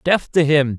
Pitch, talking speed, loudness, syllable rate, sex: 150 Hz, 230 wpm, -17 LUFS, 4.4 syllables/s, male